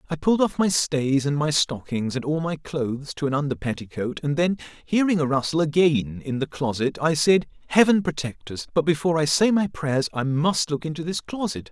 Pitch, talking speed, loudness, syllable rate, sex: 150 Hz, 215 wpm, -23 LUFS, 5.4 syllables/s, male